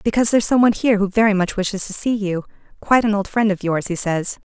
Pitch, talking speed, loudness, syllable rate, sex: 205 Hz, 265 wpm, -18 LUFS, 7.1 syllables/s, female